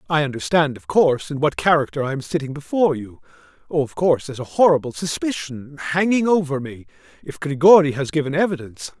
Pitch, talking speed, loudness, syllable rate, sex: 150 Hz, 180 wpm, -20 LUFS, 6.2 syllables/s, male